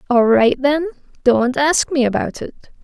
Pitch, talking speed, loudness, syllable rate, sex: 265 Hz, 170 wpm, -16 LUFS, 4.5 syllables/s, female